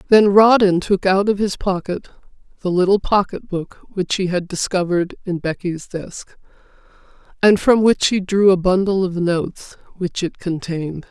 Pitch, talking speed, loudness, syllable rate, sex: 185 Hz, 165 wpm, -18 LUFS, 4.9 syllables/s, female